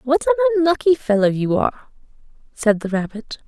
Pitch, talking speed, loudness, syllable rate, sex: 240 Hz, 155 wpm, -18 LUFS, 5.9 syllables/s, female